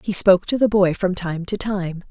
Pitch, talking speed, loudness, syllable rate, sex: 190 Hz, 255 wpm, -19 LUFS, 5.1 syllables/s, female